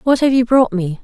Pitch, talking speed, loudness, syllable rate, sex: 235 Hz, 290 wpm, -14 LUFS, 5.4 syllables/s, female